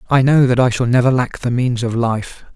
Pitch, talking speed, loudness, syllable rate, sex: 120 Hz, 260 wpm, -16 LUFS, 5.3 syllables/s, male